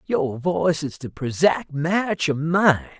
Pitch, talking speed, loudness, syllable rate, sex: 160 Hz, 160 wpm, -22 LUFS, 3.8 syllables/s, male